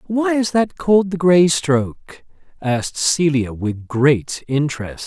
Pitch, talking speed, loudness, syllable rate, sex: 155 Hz, 140 wpm, -18 LUFS, 4.0 syllables/s, male